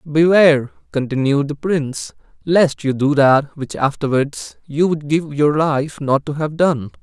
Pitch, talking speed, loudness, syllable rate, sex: 150 Hz, 160 wpm, -17 LUFS, 4.2 syllables/s, male